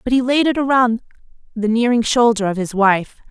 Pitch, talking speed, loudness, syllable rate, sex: 235 Hz, 200 wpm, -16 LUFS, 5.3 syllables/s, female